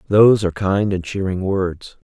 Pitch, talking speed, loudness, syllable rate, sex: 95 Hz, 170 wpm, -18 LUFS, 5.0 syllables/s, male